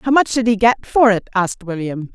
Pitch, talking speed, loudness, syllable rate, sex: 215 Hz, 250 wpm, -16 LUFS, 5.3 syllables/s, female